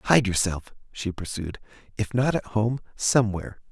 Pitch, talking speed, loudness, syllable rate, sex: 105 Hz, 145 wpm, -26 LUFS, 4.9 syllables/s, male